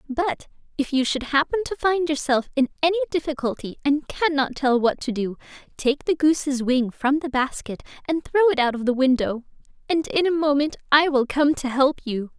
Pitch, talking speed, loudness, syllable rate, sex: 285 Hz, 200 wpm, -22 LUFS, 5.2 syllables/s, female